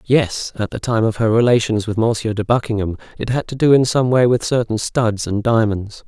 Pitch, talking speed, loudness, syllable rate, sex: 115 Hz, 225 wpm, -17 LUFS, 5.3 syllables/s, male